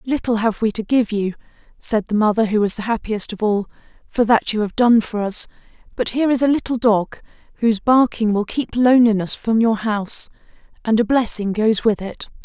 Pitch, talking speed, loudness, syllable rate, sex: 220 Hz, 205 wpm, -18 LUFS, 5.4 syllables/s, female